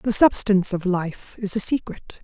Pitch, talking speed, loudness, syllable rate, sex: 200 Hz, 190 wpm, -20 LUFS, 5.0 syllables/s, female